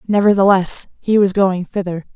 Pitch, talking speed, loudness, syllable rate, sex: 190 Hz, 140 wpm, -16 LUFS, 4.9 syllables/s, female